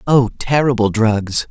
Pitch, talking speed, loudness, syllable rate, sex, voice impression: 120 Hz, 120 wpm, -16 LUFS, 3.9 syllables/s, male, very masculine, middle-aged, thick, very tensed, powerful, very bright, slightly soft, very clear, slightly muffled, very fluent, raspy, cool, intellectual, very refreshing, sincere, slightly calm, slightly mature, very friendly, very reassuring, very unique, slightly elegant, very wild, slightly sweet, very lively, slightly strict, intense, slightly sharp, light